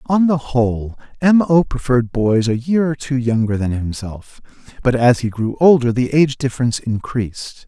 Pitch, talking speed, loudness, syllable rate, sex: 125 Hz, 180 wpm, -17 LUFS, 5.1 syllables/s, male